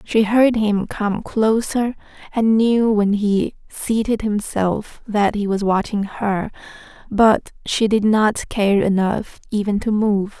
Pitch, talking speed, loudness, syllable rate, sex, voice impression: 210 Hz, 145 wpm, -19 LUFS, 3.5 syllables/s, female, very feminine, slightly young, slightly adult-like, slightly tensed, slightly weak, bright, very soft, slightly muffled, slightly halting, very cute, intellectual, slightly refreshing, sincere, very calm, very friendly, very reassuring, unique, very elegant, sweet, slightly lively, very kind, slightly modest